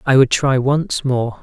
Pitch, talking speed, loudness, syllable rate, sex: 135 Hz, 210 wpm, -16 LUFS, 3.8 syllables/s, male